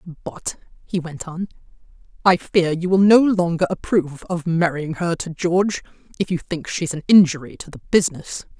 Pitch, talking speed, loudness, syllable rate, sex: 175 Hz, 175 wpm, -20 LUFS, 5.2 syllables/s, female